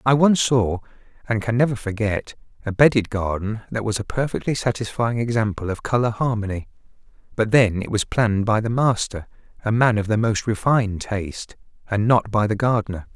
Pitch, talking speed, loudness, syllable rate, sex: 110 Hz, 180 wpm, -21 LUFS, 5.4 syllables/s, male